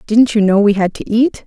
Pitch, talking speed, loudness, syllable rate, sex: 215 Hz, 285 wpm, -13 LUFS, 5.3 syllables/s, female